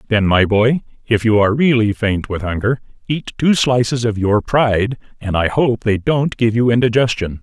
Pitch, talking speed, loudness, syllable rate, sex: 115 Hz, 195 wpm, -16 LUFS, 5.0 syllables/s, male